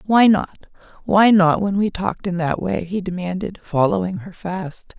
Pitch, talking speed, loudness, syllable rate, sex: 190 Hz, 170 wpm, -19 LUFS, 4.7 syllables/s, female